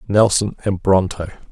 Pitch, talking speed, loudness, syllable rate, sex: 100 Hz, 120 wpm, -17 LUFS, 5.0 syllables/s, male